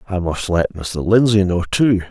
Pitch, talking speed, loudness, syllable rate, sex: 95 Hz, 200 wpm, -17 LUFS, 4.5 syllables/s, male